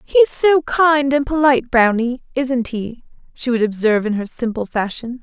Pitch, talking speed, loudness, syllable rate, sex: 255 Hz, 170 wpm, -17 LUFS, 4.7 syllables/s, female